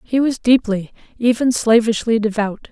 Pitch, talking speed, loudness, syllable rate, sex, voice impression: 230 Hz, 135 wpm, -17 LUFS, 4.7 syllables/s, female, feminine, slightly gender-neutral, slightly young, adult-like, slightly thick, tensed, slightly powerful, slightly bright, hard, slightly muffled, fluent, cool, very intellectual, sincere, calm, slightly mature, friendly, reassuring, slightly unique, elegant, slightly sweet, slightly lively, slightly strict, slightly sharp